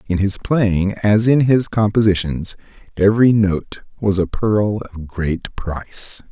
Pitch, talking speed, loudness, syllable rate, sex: 100 Hz, 145 wpm, -17 LUFS, 3.8 syllables/s, male